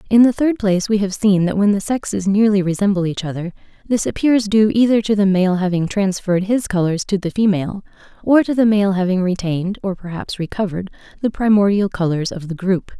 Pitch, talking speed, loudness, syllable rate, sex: 195 Hz, 205 wpm, -17 LUFS, 5.8 syllables/s, female